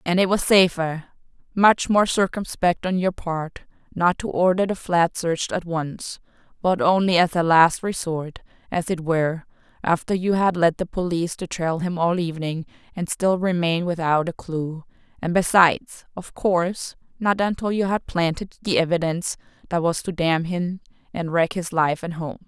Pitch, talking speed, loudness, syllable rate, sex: 175 Hz, 175 wpm, -22 LUFS, 4.7 syllables/s, female